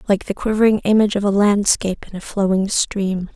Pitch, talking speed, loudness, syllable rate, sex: 200 Hz, 195 wpm, -18 LUFS, 5.8 syllables/s, female